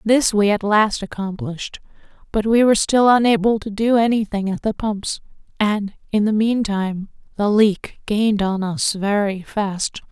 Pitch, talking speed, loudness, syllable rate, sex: 210 Hz, 160 wpm, -19 LUFS, 4.6 syllables/s, female